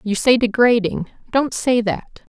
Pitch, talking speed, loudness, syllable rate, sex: 230 Hz, 150 wpm, -18 LUFS, 4.2 syllables/s, female